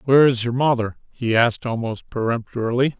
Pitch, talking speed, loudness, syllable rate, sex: 120 Hz, 160 wpm, -21 LUFS, 5.8 syllables/s, male